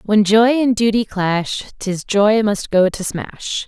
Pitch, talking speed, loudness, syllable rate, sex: 205 Hz, 195 wpm, -17 LUFS, 3.8 syllables/s, female